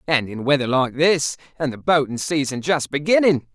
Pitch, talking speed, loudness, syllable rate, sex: 145 Hz, 185 wpm, -20 LUFS, 5.1 syllables/s, male